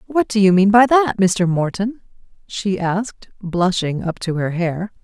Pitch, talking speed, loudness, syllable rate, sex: 195 Hz, 180 wpm, -17 LUFS, 4.2 syllables/s, female